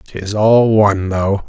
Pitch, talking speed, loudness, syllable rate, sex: 100 Hz, 160 wpm, -14 LUFS, 3.7 syllables/s, male